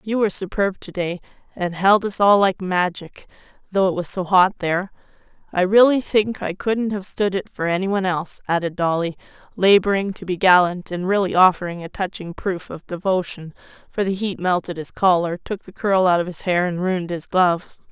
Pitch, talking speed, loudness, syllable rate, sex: 185 Hz, 195 wpm, -20 LUFS, 5.3 syllables/s, female